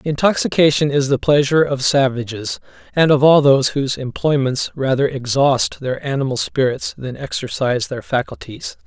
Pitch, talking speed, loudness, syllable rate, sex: 135 Hz, 140 wpm, -17 LUFS, 5.2 syllables/s, male